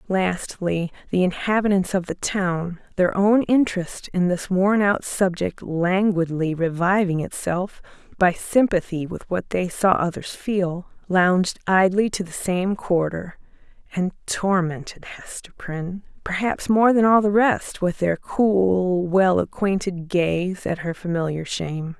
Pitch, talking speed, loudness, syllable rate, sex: 185 Hz, 140 wpm, -22 LUFS, 3.6 syllables/s, female